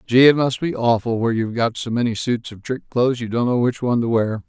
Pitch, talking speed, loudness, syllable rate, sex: 120 Hz, 280 wpm, -20 LUFS, 6.3 syllables/s, male